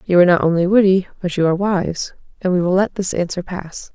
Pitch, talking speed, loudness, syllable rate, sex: 180 Hz, 245 wpm, -17 LUFS, 6.1 syllables/s, female